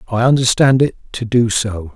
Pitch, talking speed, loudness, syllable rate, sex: 120 Hz, 185 wpm, -15 LUFS, 5.1 syllables/s, male